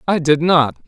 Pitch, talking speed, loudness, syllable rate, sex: 155 Hz, 205 wpm, -15 LUFS, 4.6 syllables/s, male